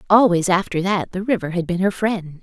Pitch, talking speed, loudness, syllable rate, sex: 185 Hz, 225 wpm, -19 LUFS, 5.4 syllables/s, female